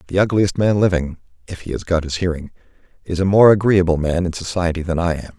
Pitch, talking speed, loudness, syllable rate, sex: 90 Hz, 200 wpm, -18 LUFS, 6.2 syllables/s, male